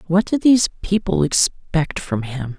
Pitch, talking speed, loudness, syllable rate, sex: 165 Hz, 165 wpm, -19 LUFS, 4.4 syllables/s, male